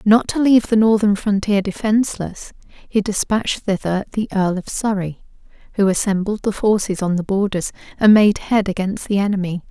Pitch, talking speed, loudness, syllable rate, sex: 200 Hz, 165 wpm, -18 LUFS, 5.2 syllables/s, female